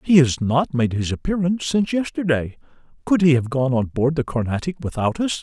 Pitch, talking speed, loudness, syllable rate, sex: 145 Hz, 200 wpm, -20 LUFS, 5.6 syllables/s, male